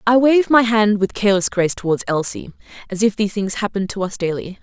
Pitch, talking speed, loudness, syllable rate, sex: 205 Hz, 210 wpm, -18 LUFS, 6.6 syllables/s, female